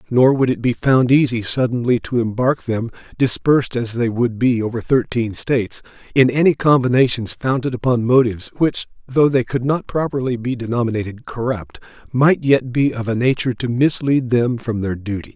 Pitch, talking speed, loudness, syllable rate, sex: 125 Hz, 175 wpm, -18 LUFS, 5.2 syllables/s, male